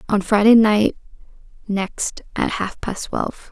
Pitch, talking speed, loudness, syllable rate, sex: 210 Hz, 135 wpm, -19 LUFS, 3.9 syllables/s, female